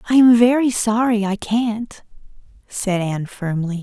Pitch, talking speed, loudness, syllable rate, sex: 215 Hz, 140 wpm, -18 LUFS, 4.4 syllables/s, female